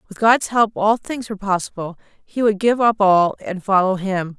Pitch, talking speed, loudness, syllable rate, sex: 205 Hz, 205 wpm, -18 LUFS, 4.8 syllables/s, female